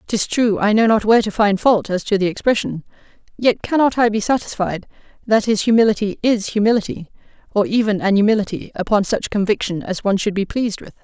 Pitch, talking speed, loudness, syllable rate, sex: 210 Hz, 195 wpm, -18 LUFS, 6.0 syllables/s, female